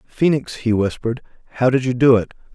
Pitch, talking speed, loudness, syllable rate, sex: 125 Hz, 190 wpm, -18 LUFS, 5.8 syllables/s, male